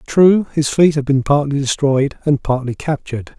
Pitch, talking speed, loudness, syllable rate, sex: 140 Hz, 175 wpm, -16 LUFS, 4.7 syllables/s, male